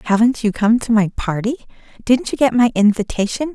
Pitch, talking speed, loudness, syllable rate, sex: 230 Hz, 185 wpm, -17 LUFS, 5.5 syllables/s, female